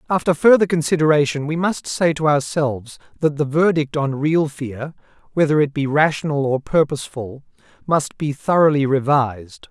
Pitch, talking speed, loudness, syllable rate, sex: 150 Hz, 150 wpm, -18 LUFS, 5.1 syllables/s, male